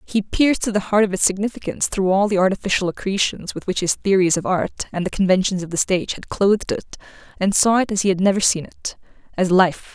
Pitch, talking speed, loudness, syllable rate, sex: 190 Hz, 235 wpm, -19 LUFS, 6.2 syllables/s, female